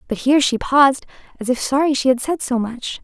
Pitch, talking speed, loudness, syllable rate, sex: 260 Hz, 235 wpm, -17 LUFS, 6.0 syllables/s, female